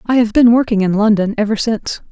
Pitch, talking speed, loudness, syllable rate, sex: 220 Hz, 225 wpm, -14 LUFS, 6.3 syllables/s, female